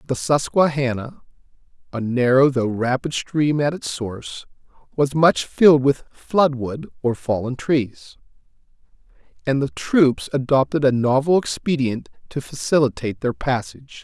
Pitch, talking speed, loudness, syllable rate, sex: 135 Hz, 130 wpm, -20 LUFS, 4.5 syllables/s, male